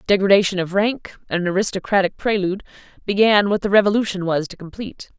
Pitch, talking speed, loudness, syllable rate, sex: 195 Hz, 150 wpm, -19 LUFS, 6.3 syllables/s, female